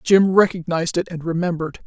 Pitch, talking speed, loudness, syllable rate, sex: 170 Hz, 160 wpm, -19 LUFS, 6.3 syllables/s, female